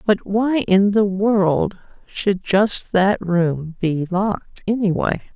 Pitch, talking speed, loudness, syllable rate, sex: 190 Hz, 135 wpm, -19 LUFS, 3.2 syllables/s, female